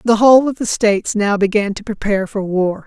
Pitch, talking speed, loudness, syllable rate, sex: 210 Hz, 230 wpm, -15 LUFS, 5.8 syllables/s, female